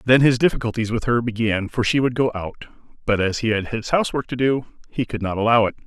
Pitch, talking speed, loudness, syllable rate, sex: 115 Hz, 245 wpm, -21 LUFS, 6.2 syllables/s, male